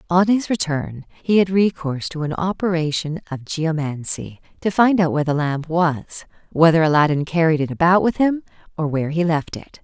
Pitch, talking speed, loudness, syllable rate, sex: 165 Hz, 175 wpm, -19 LUFS, 5.4 syllables/s, female